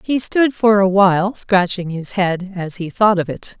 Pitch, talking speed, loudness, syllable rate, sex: 195 Hz, 200 wpm, -16 LUFS, 4.4 syllables/s, female